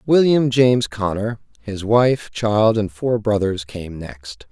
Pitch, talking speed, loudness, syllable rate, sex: 110 Hz, 145 wpm, -18 LUFS, 3.6 syllables/s, male